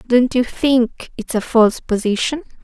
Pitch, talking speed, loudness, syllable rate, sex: 245 Hz, 160 wpm, -17 LUFS, 4.5 syllables/s, female